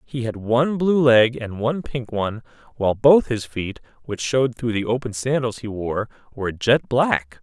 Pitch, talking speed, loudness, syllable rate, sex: 120 Hz, 180 wpm, -21 LUFS, 5.0 syllables/s, male